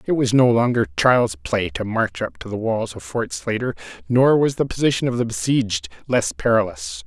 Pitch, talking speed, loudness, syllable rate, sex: 120 Hz, 205 wpm, -20 LUFS, 5.1 syllables/s, male